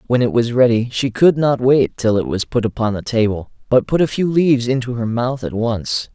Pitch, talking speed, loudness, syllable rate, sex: 120 Hz, 245 wpm, -17 LUFS, 5.2 syllables/s, male